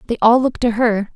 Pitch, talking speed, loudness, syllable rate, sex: 230 Hz, 260 wpm, -16 LUFS, 6.5 syllables/s, female